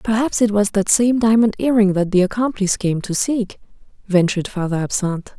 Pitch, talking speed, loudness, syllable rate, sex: 205 Hz, 180 wpm, -18 LUFS, 5.7 syllables/s, female